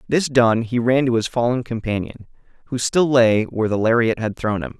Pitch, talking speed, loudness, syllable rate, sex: 120 Hz, 215 wpm, -19 LUFS, 5.3 syllables/s, male